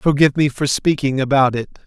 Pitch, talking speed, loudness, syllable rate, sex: 140 Hz, 195 wpm, -17 LUFS, 5.7 syllables/s, male